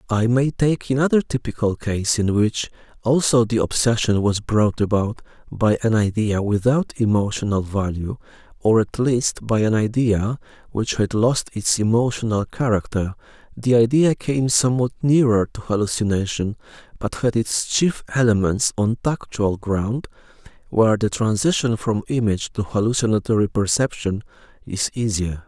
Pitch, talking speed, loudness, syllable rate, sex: 115 Hz, 135 wpm, -20 LUFS, 4.7 syllables/s, male